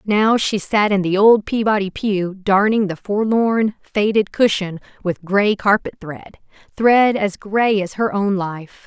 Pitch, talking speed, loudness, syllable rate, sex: 205 Hz, 160 wpm, -17 LUFS, 3.8 syllables/s, female